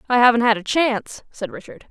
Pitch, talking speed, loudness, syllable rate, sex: 225 Hz, 220 wpm, -18 LUFS, 6.0 syllables/s, female